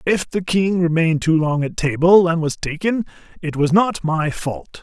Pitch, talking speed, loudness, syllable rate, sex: 165 Hz, 200 wpm, -18 LUFS, 4.6 syllables/s, male